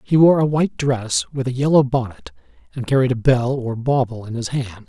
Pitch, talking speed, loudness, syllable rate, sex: 130 Hz, 220 wpm, -19 LUFS, 5.5 syllables/s, male